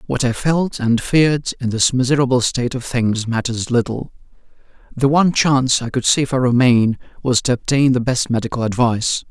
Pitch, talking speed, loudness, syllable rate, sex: 125 Hz, 180 wpm, -17 LUFS, 5.5 syllables/s, male